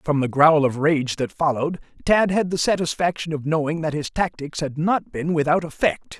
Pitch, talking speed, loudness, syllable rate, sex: 155 Hz, 205 wpm, -21 LUFS, 5.1 syllables/s, male